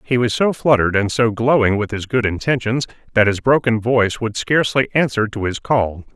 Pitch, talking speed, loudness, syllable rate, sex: 115 Hz, 205 wpm, -17 LUFS, 5.5 syllables/s, male